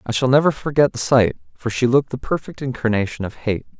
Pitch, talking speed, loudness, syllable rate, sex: 125 Hz, 220 wpm, -19 LUFS, 6.2 syllables/s, male